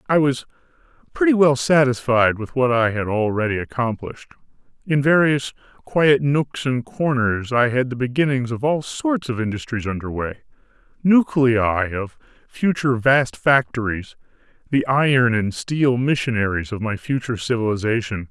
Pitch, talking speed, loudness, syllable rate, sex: 125 Hz, 135 wpm, -20 LUFS, 4.8 syllables/s, male